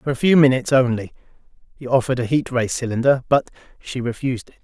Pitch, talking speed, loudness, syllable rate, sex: 125 Hz, 195 wpm, -19 LUFS, 6.7 syllables/s, male